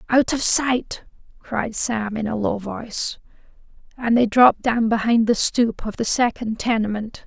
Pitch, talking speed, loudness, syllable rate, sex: 230 Hz, 165 wpm, -20 LUFS, 4.3 syllables/s, female